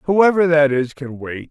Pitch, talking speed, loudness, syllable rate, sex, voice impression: 150 Hz, 200 wpm, -16 LUFS, 4.1 syllables/s, male, very masculine, old, very thick, slightly relaxed, slightly powerful, slightly dark, slightly soft, muffled, slightly halting, slightly raspy, slightly cool, intellectual, very sincere, very calm, very mature, friendly, very reassuring, very unique, slightly elegant, wild, slightly sweet, slightly lively, kind, modest